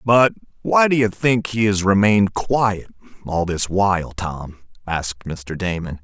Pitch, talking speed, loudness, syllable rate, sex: 100 Hz, 160 wpm, -19 LUFS, 4.3 syllables/s, male